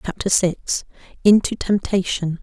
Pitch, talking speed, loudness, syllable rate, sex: 190 Hz, 100 wpm, -19 LUFS, 4.2 syllables/s, female